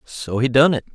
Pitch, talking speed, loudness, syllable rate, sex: 130 Hz, 255 wpm, -18 LUFS, 5.1 syllables/s, male